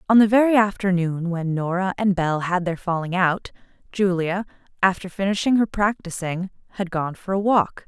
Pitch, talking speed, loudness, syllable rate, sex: 185 Hz, 170 wpm, -22 LUFS, 5.1 syllables/s, female